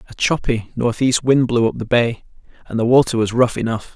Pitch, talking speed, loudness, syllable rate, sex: 120 Hz, 210 wpm, -18 LUFS, 5.4 syllables/s, male